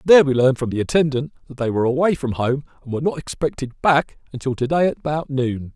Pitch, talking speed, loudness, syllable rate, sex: 135 Hz, 230 wpm, -20 LUFS, 6.5 syllables/s, male